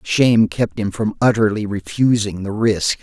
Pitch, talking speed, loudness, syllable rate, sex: 110 Hz, 160 wpm, -18 LUFS, 4.6 syllables/s, male